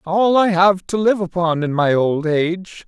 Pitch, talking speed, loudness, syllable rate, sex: 180 Hz, 210 wpm, -17 LUFS, 4.4 syllables/s, male